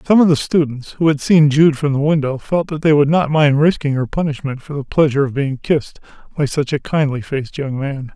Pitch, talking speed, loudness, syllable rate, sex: 145 Hz, 245 wpm, -16 LUFS, 5.7 syllables/s, male